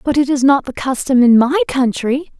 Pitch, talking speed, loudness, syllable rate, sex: 260 Hz, 225 wpm, -14 LUFS, 5.6 syllables/s, female